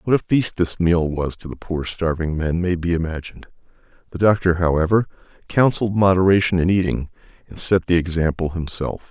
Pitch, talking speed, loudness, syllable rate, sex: 90 Hz, 170 wpm, -20 LUFS, 5.6 syllables/s, male